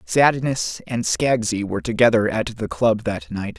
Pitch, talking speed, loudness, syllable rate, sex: 110 Hz, 165 wpm, -20 LUFS, 4.4 syllables/s, male